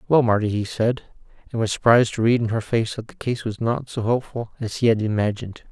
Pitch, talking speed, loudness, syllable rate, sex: 115 Hz, 240 wpm, -22 LUFS, 6.1 syllables/s, male